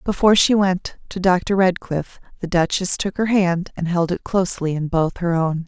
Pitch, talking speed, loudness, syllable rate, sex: 180 Hz, 200 wpm, -19 LUFS, 4.8 syllables/s, female